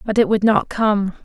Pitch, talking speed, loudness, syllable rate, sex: 210 Hz, 240 wpm, -17 LUFS, 4.7 syllables/s, female